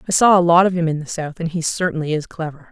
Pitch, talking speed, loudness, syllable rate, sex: 165 Hz, 310 wpm, -18 LUFS, 6.7 syllables/s, female